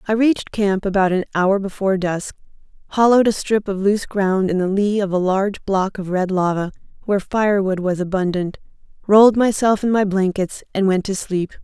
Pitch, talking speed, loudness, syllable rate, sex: 195 Hz, 190 wpm, -18 LUFS, 5.5 syllables/s, female